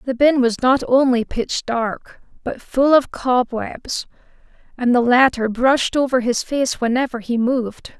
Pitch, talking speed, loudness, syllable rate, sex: 250 Hz, 160 wpm, -18 LUFS, 4.2 syllables/s, female